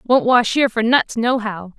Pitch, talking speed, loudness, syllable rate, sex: 230 Hz, 200 wpm, -17 LUFS, 4.6 syllables/s, female